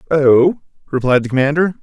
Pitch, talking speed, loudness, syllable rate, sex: 145 Hz, 130 wpm, -14 LUFS, 5.3 syllables/s, male